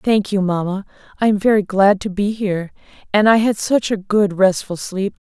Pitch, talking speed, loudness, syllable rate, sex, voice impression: 200 Hz, 205 wpm, -17 LUFS, 5.1 syllables/s, female, feminine, adult-like, tensed, powerful, hard, clear, slightly raspy, intellectual, calm, slightly unique, lively, strict, sharp